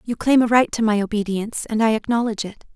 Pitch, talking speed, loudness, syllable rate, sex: 220 Hz, 240 wpm, -20 LUFS, 6.6 syllables/s, female